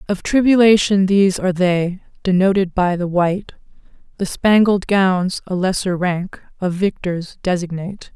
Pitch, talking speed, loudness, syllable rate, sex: 185 Hz, 130 wpm, -17 LUFS, 4.7 syllables/s, female